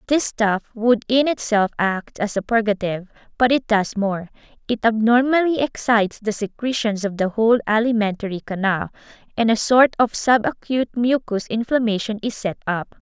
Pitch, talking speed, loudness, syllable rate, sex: 220 Hz, 155 wpm, -20 LUFS, 5.1 syllables/s, female